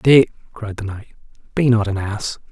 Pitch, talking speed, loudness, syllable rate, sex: 110 Hz, 190 wpm, -19 LUFS, 4.6 syllables/s, male